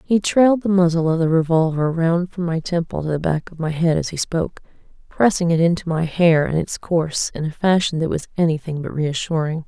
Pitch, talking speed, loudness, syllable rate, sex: 165 Hz, 225 wpm, -19 LUFS, 5.6 syllables/s, female